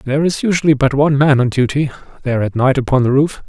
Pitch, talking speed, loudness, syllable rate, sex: 140 Hz, 240 wpm, -15 LUFS, 6.8 syllables/s, male